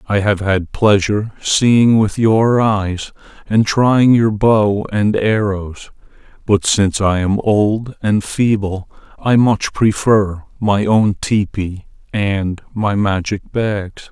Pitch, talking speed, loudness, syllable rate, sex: 105 Hz, 130 wpm, -15 LUFS, 3.3 syllables/s, male